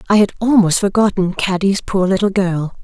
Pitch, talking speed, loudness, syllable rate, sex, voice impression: 195 Hz, 170 wpm, -15 LUFS, 5.2 syllables/s, female, feminine, gender-neutral, very adult-like, middle-aged, slightly thin, slightly relaxed, slightly weak, slightly bright, very soft, clear, fluent, slightly raspy, cute, slightly cool, intellectual, refreshing, very sincere, very calm, very friendly, very reassuring, unique, very elegant, slightly wild, sweet, lively, very kind, slightly intense, modest